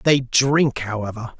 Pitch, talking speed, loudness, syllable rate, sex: 125 Hz, 130 wpm, -20 LUFS, 4.0 syllables/s, male